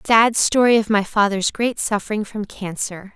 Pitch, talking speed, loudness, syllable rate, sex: 210 Hz, 190 wpm, -19 LUFS, 5.0 syllables/s, female